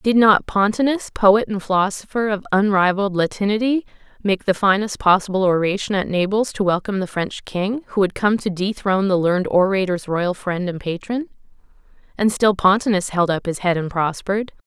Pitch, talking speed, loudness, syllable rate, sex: 195 Hz, 170 wpm, -19 LUFS, 5.4 syllables/s, female